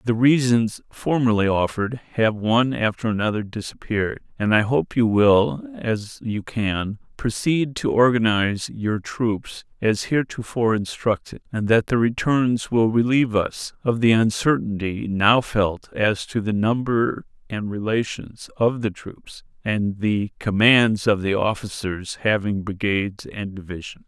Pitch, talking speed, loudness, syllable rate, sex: 110 Hz, 140 wpm, -21 LUFS, 4.2 syllables/s, male